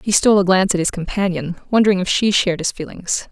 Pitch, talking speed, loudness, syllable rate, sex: 185 Hz, 235 wpm, -17 LUFS, 6.8 syllables/s, female